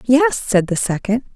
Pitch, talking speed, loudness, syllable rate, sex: 230 Hz, 180 wpm, -17 LUFS, 4.2 syllables/s, female